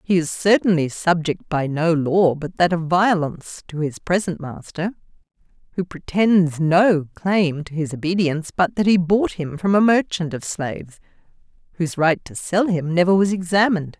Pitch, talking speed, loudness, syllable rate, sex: 175 Hz, 170 wpm, -20 LUFS, 4.8 syllables/s, female